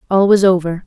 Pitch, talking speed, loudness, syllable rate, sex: 185 Hz, 205 wpm, -13 LUFS, 6.0 syllables/s, female